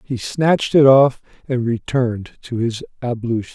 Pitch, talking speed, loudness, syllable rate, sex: 125 Hz, 150 wpm, -18 LUFS, 4.7 syllables/s, male